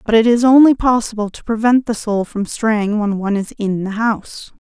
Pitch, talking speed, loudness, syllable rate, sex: 220 Hz, 220 wpm, -16 LUFS, 5.2 syllables/s, female